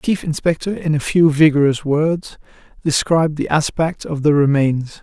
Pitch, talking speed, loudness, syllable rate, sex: 155 Hz, 165 wpm, -17 LUFS, 4.9 syllables/s, male